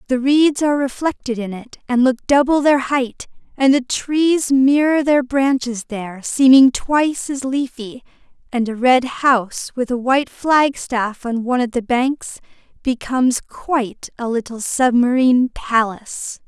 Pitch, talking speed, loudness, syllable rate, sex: 255 Hz, 150 wpm, -17 LUFS, 4.3 syllables/s, female